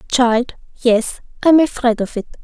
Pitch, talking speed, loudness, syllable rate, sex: 245 Hz, 150 wpm, -16 LUFS, 4.2 syllables/s, female